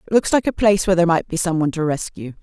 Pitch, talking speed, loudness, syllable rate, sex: 175 Hz, 295 wpm, -18 LUFS, 8.1 syllables/s, female